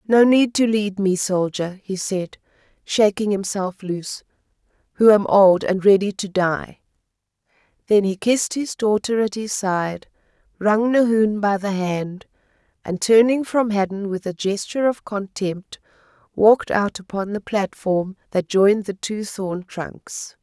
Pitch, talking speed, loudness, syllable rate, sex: 200 Hz, 150 wpm, -20 LUFS, 4.2 syllables/s, female